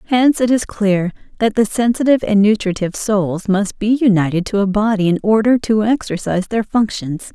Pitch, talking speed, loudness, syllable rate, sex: 210 Hz, 180 wpm, -16 LUFS, 5.4 syllables/s, female